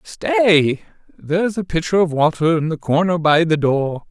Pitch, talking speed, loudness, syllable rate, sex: 165 Hz, 175 wpm, -17 LUFS, 4.3 syllables/s, male